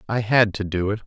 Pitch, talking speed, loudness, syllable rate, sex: 105 Hz, 280 wpm, -21 LUFS, 5.9 syllables/s, male